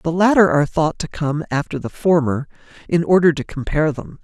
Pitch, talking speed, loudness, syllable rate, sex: 160 Hz, 200 wpm, -18 LUFS, 5.8 syllables/s, male